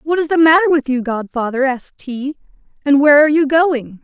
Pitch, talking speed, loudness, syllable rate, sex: 285 Hz, 210 wpm, -14 LUFS, 5.7 syllables/s, female